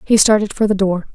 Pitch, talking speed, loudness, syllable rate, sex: 200 Hz, 260 wpm, -15 LUFS, 5.9 syllables/s, female